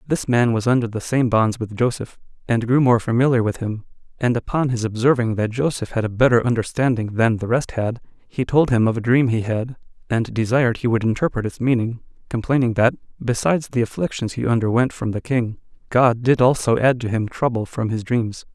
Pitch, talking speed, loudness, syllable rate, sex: 120 Hz, 205 wpm, -20 LUFS, 5.5 syllables/s, male